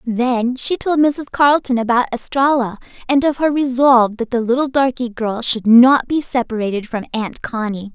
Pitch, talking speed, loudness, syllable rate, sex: 245 Hz, 175 wpm, -16 LUFS, 4.9 syllables/s, female